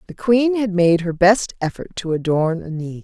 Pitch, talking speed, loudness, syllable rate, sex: 185 Hz, 200 wpm, -18 LUFS, 5.0 syllables/s, female